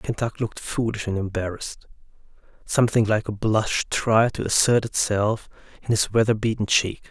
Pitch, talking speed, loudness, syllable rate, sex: 110 Hz, 150 wpm, -22 LUFS, 5.1 syllables/s, male